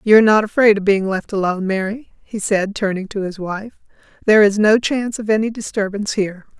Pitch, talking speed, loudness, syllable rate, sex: 205 Hz, 210 wpm, -17 LUFS, 6.2 syllables/s, female